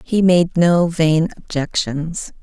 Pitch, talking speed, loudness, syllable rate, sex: 165 Hz, 125 wpm, -17 LUFS, 3.2 syllables/s, female